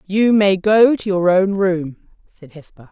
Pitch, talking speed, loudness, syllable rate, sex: 190 Hz, 185 wpm, -15 LUFS, 3.8 syllables/s, female